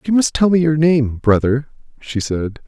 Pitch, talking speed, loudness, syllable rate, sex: 140 Hz, 200 wpm, -16 LUFS, 4.8 syllables/s, male